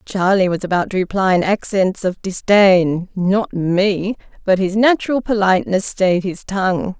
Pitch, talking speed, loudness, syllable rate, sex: 190 Hz, 155 wpm, -17 LUFS, 4.5 syllables/s, female